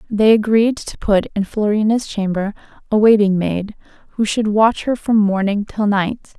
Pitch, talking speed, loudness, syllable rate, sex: 210 Hz, 170 wpm, -17 LUFS, 4.6 syllables/s, female